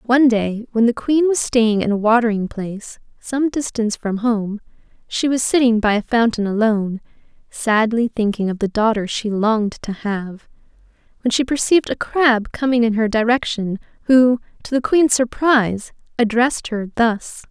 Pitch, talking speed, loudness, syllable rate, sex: 230 Hz, 165 wpm, -18 LUFS, 4.8 syllables/s, female